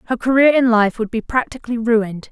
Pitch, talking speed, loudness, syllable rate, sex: 235 Hz, 205 wpm, -17 LUFS, 6.2 syllables/s, female